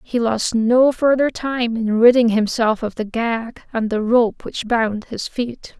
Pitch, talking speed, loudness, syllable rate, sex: 230 Hz, 185 wpm, -18 LUFS, 3.8 syllables/s, female